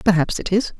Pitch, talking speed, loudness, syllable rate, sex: 185 Hz, 230 wpm, -20 LUFS, 6.0 syllables/s, female